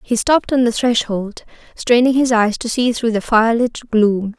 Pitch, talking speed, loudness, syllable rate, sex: 230 Hz, 205 wpm, -16 LUFS, 4.5 syllables/s, female